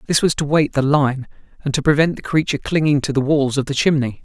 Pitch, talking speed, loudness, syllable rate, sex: 145 Hz, 255 wpm, -18 LUFS, 6.2 syllables/s, male